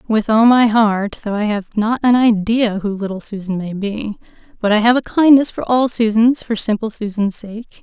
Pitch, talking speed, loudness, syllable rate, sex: 220 Hz, 205 wpm, -16 LUFS, 4.8 syllables/s, female